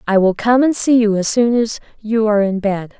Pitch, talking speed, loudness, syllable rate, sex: 215 Hz, 260 wpm, -15 LUFS, 5.3 syllables/s, female